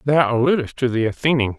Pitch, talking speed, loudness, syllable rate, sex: 130 Hz, 190 wpm, -19 LUFS, 6.2 syllables/s, male